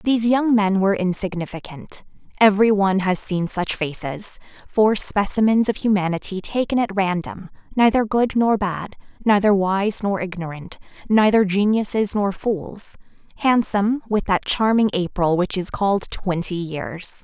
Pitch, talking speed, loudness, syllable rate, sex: 200 Hz, 140 wpm, -20 LUFS, 4.7 syllables/s, female